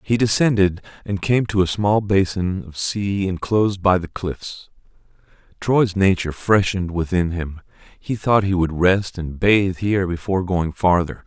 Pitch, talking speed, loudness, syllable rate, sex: 95 Hz, 160 wpm, -20 LUFS, 4.5 syllables/s, male